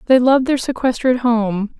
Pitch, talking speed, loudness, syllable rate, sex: 245 Hz, 170 wpm, -16 LUFS, 5.7 syllables/s, female